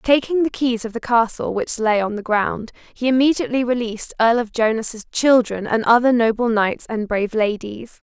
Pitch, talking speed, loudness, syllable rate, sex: 230 Hz, 185 wpm, -19 LUFS, 5.1 syllables/s, female